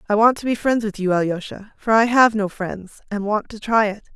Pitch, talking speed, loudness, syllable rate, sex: 215 Hz, 260 wpm, -20 LUFS, 5.5 syllables/s, female